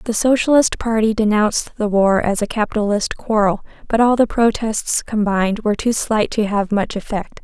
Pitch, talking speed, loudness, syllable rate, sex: 215 Hz, 180 wpm, -17 LUFS, 5.0 syllables/s, female